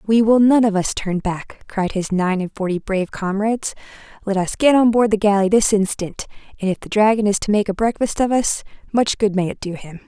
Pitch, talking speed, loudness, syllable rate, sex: 205 Hz, 240 wpm, -18 LUFS, 5.6 syllables/s, female